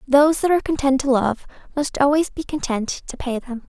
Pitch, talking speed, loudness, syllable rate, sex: 275 Hz, 210 wpm, -20 LUFS, 5.6 syllables/s, female